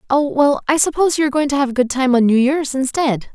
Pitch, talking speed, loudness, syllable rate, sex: 275 Hz, 285 wpm, -16 LUFS, 6.5 syllables/s, female